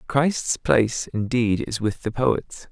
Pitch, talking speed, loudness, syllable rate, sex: 115 Hz, 155 wpm, -23 LUFS, 3.6 syllables/s, male